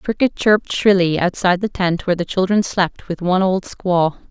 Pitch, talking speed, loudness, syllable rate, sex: 185 Hz, 210 wpm, -17 LUFS, 5.5 syllables/s, female